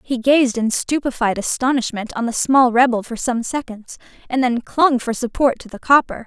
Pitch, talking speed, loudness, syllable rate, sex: 245 Hz, 190 wpm, -18 LUFS, 5.0 syllables/s, female